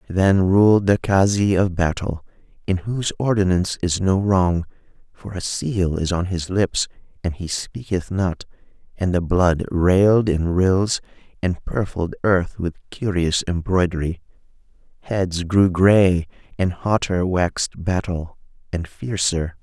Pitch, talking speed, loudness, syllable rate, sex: 90 Hz, 135 wpm, -20 LUFS, 4.0 syllables/s, male